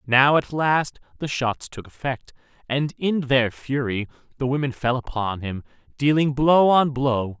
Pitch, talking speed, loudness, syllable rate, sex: 135 Hz, 160 wpm, -22 LUFS, 4.1 syllables/s, male